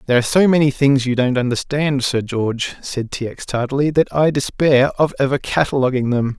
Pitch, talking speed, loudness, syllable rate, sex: 135 Hz, 195 wpm, -17 LUFS, 5.4 syllables/s, male